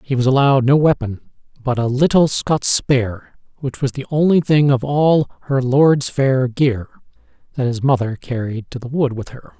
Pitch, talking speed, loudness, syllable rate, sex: 130 Hz, 190 wpm, -17 LUFS, 5.4 syllables/s, male